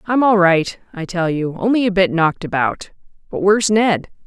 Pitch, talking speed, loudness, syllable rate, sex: 190 Hz, 195 wpm, -17 LUFS, 5.2 syllables/s, female